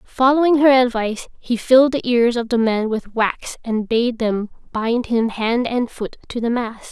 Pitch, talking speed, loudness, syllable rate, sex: 235 Hz, 200 wpm, -18 LUFS, 4.5 syllables/s, female